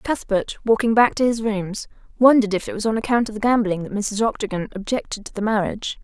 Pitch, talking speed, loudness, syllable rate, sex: 215 Hz, 220 wpm, -21 LUFS, 6.2 syllables/s, female